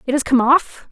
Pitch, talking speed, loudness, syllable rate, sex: 270 Hz, 260 wpm, -16 LUFS, 5.2 syllables/s, female